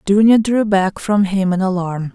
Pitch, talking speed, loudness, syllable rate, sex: 195 Hz, 195 wpm, -16 LUFS, 4.4 syllables/s, female